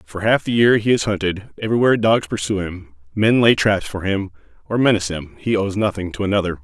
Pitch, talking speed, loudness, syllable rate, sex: 100 Hz, 215 wpm, -18 LUFS, 6.0 syllables/s, male